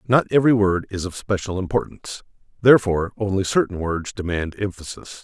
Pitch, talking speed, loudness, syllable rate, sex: 100 Hz, 140 wpm, -21 LUFS, 6.0 syllables/s, male